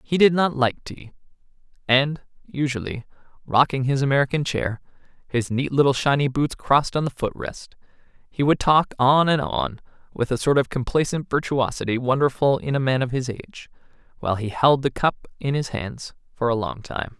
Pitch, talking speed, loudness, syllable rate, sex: 135 Hz, 180 wpm, -22 LUFS, 5.2 syllables/s, male